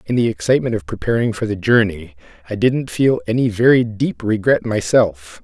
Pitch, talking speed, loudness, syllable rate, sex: 115 Hz, 175 wpm, -17 LUFS, 5.3 syllables/s, male